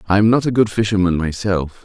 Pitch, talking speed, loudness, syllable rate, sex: 100 Hz, 230 wpm, -17 LUFS, 5.9 syllables/s, male